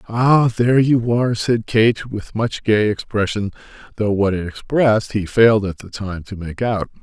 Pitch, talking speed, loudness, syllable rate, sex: 110 Hz, 190 wpm, -18 LUFS, 4.6 syllables/s, male